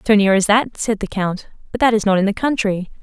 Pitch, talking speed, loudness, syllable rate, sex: 210 Hz, 280 wpm, -17 LUFS, 5.9 syllables/s, female